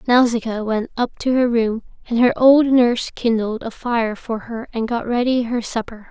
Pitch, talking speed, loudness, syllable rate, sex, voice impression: 235 Hz, 195 wpm, -19 LUFS, 4.8 syllables/s, female, feminine, young, tensed, powerful, bright, soft, slightly muffled, cute, friendly, slightly sweet, kind, slightly modest